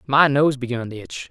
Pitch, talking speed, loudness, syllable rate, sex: 130 Hz, 230 wpm, -20 LUFS, 5.0 syllables/s, male